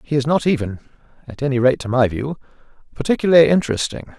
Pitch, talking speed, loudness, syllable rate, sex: 135 Hz, 170 wpm, -18 LUFS, 6.7 syllables/s, male